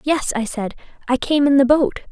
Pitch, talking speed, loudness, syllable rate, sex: 270 Hz, 225 wpm, -18 LUFS, 5.1 syllables/s, female